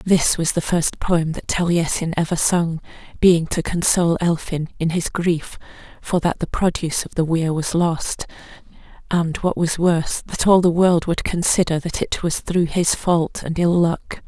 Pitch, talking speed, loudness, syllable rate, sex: 170 Hz, 185 wpm, -19 LUFS, 4.4 syllables/s, female